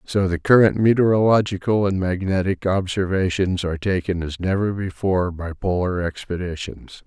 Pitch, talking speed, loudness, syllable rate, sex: 95 Hz, 125 wpm, -20 LUFS, 5.0 syllables/s, male